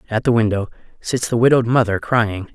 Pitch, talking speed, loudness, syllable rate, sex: 115 Hz, 190 wpm, -18 LUFS, 5.9 syllables/s, male